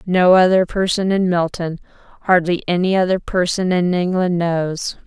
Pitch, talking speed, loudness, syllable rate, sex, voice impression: 180 Hz, 130 wpm, -17 LUFS, 4.6 syllables/s, female, very feminine, very adult-like, thin, tensed, slightly weak, dark, soft, clear, slightly fluent, slightly raspy, cool, slightly intellectual, slightly refreshing, slightly sincere, very calm, friendly, slightly reassuring, unique, elegant, slightly wild, very sweet, slightly lively, kind, modest